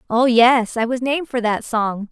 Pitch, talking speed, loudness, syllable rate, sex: 235 Hz, 225 wpm, -18 LUFS, 4.7 syllables/s, female